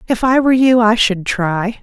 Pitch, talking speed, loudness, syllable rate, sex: 225 Hz, 230 wpm, -13 LUFS, 4.8 syllables/s, female